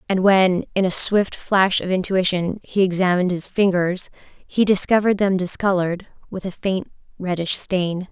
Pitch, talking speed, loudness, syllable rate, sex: 185 Hz, 155 wpm, -19 LUFS, 4.8 syllables/s, female